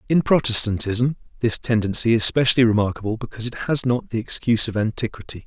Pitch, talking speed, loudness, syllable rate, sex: 115 Hz, 165 wpm, -20 LUFS, 6.4 syllables/s, male